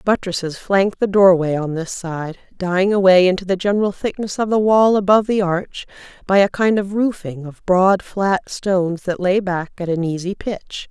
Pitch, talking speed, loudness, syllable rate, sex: 190 Hz, 195 wpm, -18 LUFS, 4.8 syllables/s, female